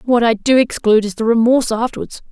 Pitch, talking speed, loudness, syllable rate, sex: 230 Hz, 205 wpm, -15 LUFS, 6.6 syllables/s, female